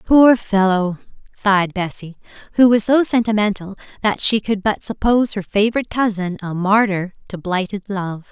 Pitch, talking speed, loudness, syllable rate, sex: 205 Hz, 150 wpm, -18 LUFS, 5.1 syllables/s, female